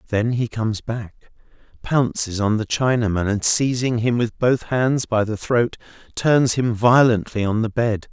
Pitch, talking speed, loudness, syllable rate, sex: 115 Hz, 170 wpm, -20 LUFS, 4.3 syllables/s, male